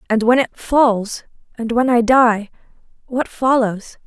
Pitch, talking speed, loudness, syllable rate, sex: 235 Hz, 150 wpm, -16 LUFS, 3.8 syllables/s, female